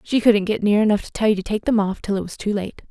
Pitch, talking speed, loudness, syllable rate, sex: 210 Hz, 350 wpm, -20 LUFS, 6.6 syllables/s, female